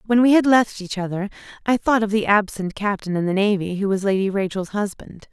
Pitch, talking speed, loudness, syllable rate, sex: 205 Hz, 225 wpm, -20 LUFS, 5.6 syllables/s, female